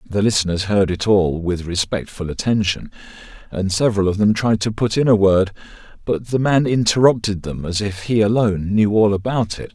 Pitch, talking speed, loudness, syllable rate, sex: 100 Hz, 190 wpm, -18 LUFS, 5.3 syllables/s, male